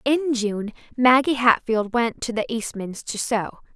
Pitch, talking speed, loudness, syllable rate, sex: 235 Hz, 160 wpm, -22 LUFS, 4.0 syllables/s, female